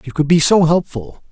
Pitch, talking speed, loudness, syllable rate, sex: 155 Hz, 225 wpm, -14 LUFS, 5.2 syllables/s, male